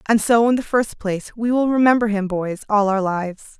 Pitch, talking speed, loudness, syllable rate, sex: 215 Hz, 235 wpm, -19 LUFS, 5.6 syllables/s, female